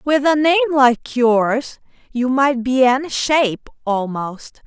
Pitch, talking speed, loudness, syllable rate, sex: 260 Hz, 140 wpm, -17 LUFS, 3.5 syllables/s, female